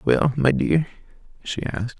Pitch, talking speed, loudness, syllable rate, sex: 130 Hz, 150 wpm, -22 LUFS, 4.7 syllables/s, male